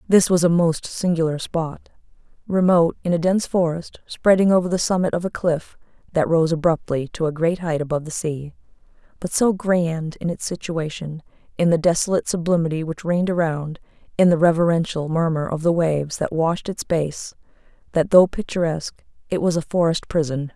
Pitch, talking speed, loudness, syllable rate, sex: 165 Hz, 175 wpm, -21 LUFS, 5.4 syllables/s, female